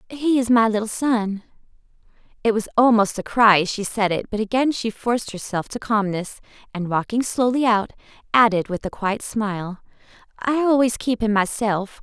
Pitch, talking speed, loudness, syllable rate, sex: 220 Hz, 175 wpm, -21 LUFS, 5.0 syllables/s, female